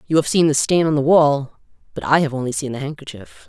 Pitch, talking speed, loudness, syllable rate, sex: 145 Hz, 260 wpm, -18 LUFS, 6.0 syllables/s, female